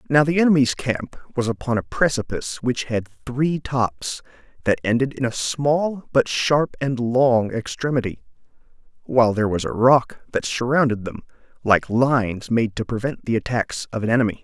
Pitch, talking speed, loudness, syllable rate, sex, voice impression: 120 Hz, 165 wpm, -21 LUFS, 4.9 syllables/s, male, masculine, adult-like, relaxed, soft, raspy, cool, intellectual, calm, friendly, reassuring, slightly wild, slightly lively, kind